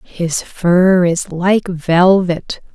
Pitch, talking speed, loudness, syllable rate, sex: 175 Hz, 110 wpm, -14 LUFS, 2.3 syllables/s, female